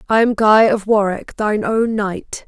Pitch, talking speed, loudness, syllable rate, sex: 210 Hz, 195 wpm, -16 LUFS, 4.4 syllables/s, female